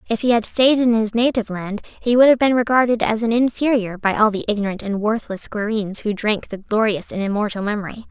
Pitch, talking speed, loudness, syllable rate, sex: 220 Hz, 220 wpm, -19 LUFS, 5.8 syllables/s, female